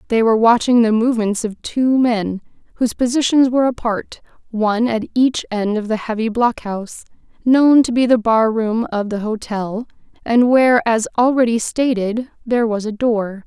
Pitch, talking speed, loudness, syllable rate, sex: 230 Hz, 165 wpm, -17 LUFS, 5.0 syllables/s, female